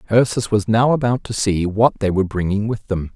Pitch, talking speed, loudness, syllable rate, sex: 110 Hz, 230 wpm, -18 LUFS, 5.5 syllables/s, male